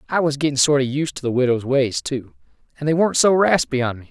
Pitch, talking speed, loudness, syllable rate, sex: 135 Hz, 265 wpm, -19 LUFS, 6.0 syllables/s, male